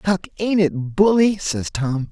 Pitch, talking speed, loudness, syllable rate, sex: 170 Hz, 170 wpm, -19 LUFS, 3.7 syllables/s, male